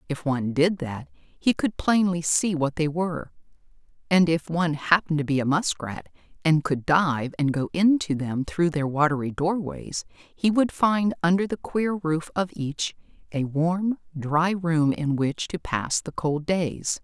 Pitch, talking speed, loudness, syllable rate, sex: 160 Hz, 175 wpm, -24 LUFS, 4.1 syllables/s, female